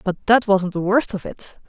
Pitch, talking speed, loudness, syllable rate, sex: 200 Hz, 250 wpm, -19 LUFS, 4.6 syllables/s, female